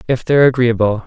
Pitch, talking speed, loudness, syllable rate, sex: 120 Hz, 170 wpm, -14 LUFS, 6.6 syllables/s, male